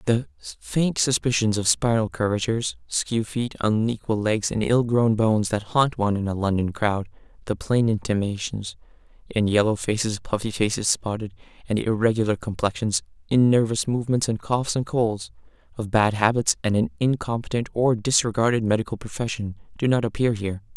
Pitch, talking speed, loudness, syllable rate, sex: 110 Hz, 150 wpm, -23 LUFS, 5.3 syllables/s, male